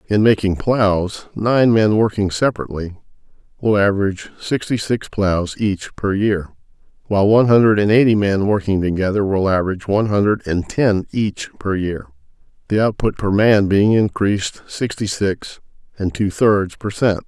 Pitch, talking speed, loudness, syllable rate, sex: 100 Hz, 155 wpm, -17 LUFS, 4.8 syllables/s, male